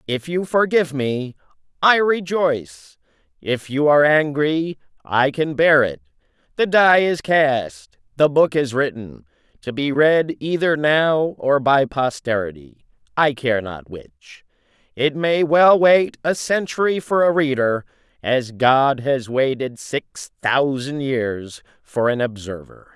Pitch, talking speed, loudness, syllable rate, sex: 140 Hz, 140 wpm, -18 LUFS, 3.9 syllables/s, male